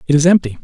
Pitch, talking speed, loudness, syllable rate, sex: 155 Hz, 285 wpm, -13 LUFS, 8.5 syllables/s, male